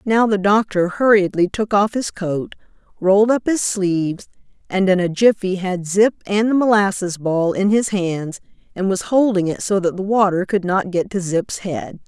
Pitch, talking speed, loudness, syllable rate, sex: 195 Hz, 195 wpm, -18 LUFS, 4.6 syllables/s, female